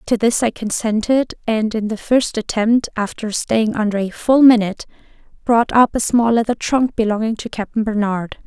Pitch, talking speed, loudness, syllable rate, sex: 225 Hz, 175 wpm, -17 LUFS, 4.9 syllables/s, female